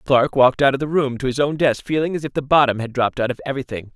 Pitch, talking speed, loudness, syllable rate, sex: 135 Hz, 305 wpm, -19 LUFS, 7.1 syllables/s, male